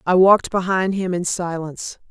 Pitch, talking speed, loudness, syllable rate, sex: 180 Hz, 170 wpm, -19 LUFS, 5.3 syllables/s, female